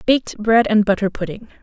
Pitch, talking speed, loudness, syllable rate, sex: 210 Hz, 185 wpm, -18 LUFS, 5.8 syllables/s, female